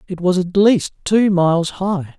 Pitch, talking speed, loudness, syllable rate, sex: 180 Hz, 190 wpm, -16 LUFS, 4.4 syllables/s, male